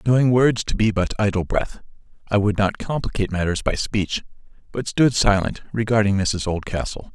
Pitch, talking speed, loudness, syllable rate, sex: 105 Hz, 170 wpm, -21 LUFS, 5.3 syllables/s, male